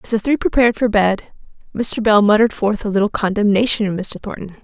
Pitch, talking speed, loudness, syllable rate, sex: 215 Hz, 205 wpm, -16 LUFS, 6.2 syllables/s, female